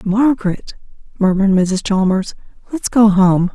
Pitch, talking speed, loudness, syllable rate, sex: 200 Hz, 120 wpm, -15 LUFS, 4.5 syllables/s, female